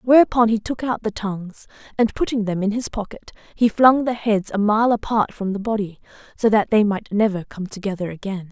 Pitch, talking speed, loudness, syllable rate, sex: 210 Hz, 210 wpm, -20 LUFS, 5.4 syllables/s, female